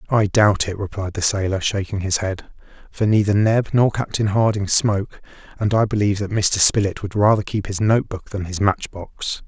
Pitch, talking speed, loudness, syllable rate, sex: 100 Hz, 205 wpm, -19 LUFS, 5.1 syllables/s, male